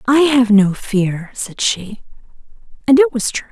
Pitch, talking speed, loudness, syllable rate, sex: 235 Hz, 170 wpm, -15 LUFS, 4.1 syllables/s, female